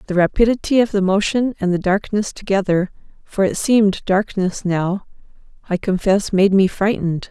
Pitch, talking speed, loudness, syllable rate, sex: 195 Hz, 140 wpm, -18 LUFS, 5.1 syllables/s, female